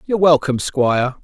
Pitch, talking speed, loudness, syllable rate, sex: 145 Hz, 145 wpm, -16 LUFS, 6.5 syllables/s, male